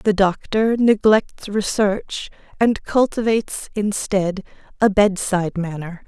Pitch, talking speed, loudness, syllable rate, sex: 205 Hz, 100 wpm, -19 LUFS, 3.8 syllables/s, female